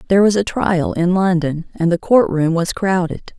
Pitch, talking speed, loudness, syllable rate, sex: 180 Hz, 215 wpm, -17 LUFS, 4.8 syllables/s, female